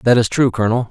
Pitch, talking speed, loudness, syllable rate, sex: 115 Hz, 265 wpm, -16 LUFS, 7.6 syllables/s, male